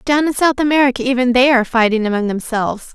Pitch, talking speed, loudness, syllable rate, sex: 250 Hz, 205 wpm, -15 LUFS, 6.8 syllables/s, female